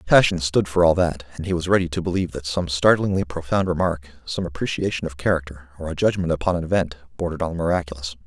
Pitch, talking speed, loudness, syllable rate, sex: 85 Hz, 220 wpm, -22 LUFS, 6.8 syllables/s, male